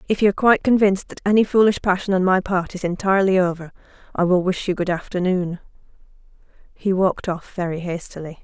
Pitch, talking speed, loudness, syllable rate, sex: 185 Hz, 180 wpm, -20 LUFS, 6.3 syllables/s, female